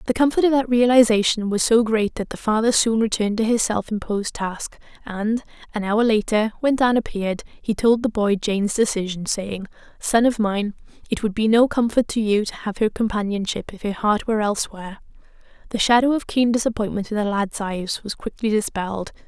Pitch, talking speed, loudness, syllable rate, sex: 215 Hz, 195 wpm, -21 LUFS, 5.5 syllables/s, female